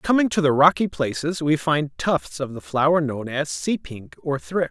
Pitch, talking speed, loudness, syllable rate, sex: 150 Hz, 215 wpm, -22 LUFS, 4.6 syllables/s, male